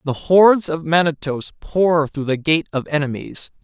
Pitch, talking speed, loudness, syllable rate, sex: 155 Hz, 165 wpm, -18 LUFS, 4.6 syllables/s, male